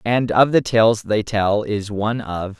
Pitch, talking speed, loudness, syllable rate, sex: 110 Hz, 210 wpm, -18 LUFS, 4.0 syllables/s, male